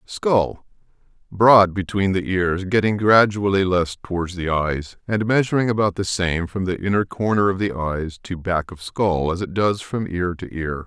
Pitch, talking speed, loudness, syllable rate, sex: 95 Hz, 180 wpm, -20 LUFS, 4.5 syllables/s, male